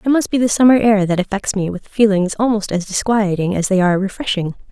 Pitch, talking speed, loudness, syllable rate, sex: 205 Hz, 230 wpm, -16 LUFS, 6.1 syllables/s, female